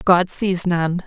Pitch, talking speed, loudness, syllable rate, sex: 180 Hz, 170 wpm, -19 LUFS, 3.1 syllables/s, female